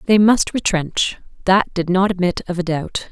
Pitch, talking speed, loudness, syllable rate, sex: 185 Hz, 190 wpm, -18 LUFS, 4.6 syllables/s, female